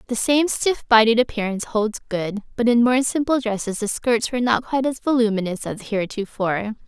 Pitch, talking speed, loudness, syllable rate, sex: 230 Hz, 185 wpm, -21 LUFS, 5.7 syllables/s, female